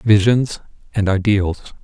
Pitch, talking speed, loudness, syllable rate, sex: 105 Hz, 100 wpm, -18 LUFS, 3.9 syllables/s, male